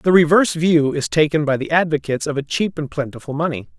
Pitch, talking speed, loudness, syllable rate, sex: 150 Hz, 220 wpm, -18 LUFS, 6.3 syllables/s, male